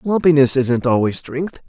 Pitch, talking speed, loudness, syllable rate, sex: 145 Hz, 145 wpm, -17 LUFS, 4.6 syllables/s, male